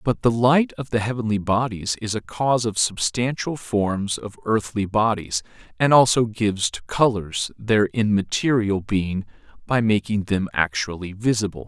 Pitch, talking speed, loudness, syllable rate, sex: 110 Hz, 150 wpm, -22 LUFS, 4.5 syllables/s, male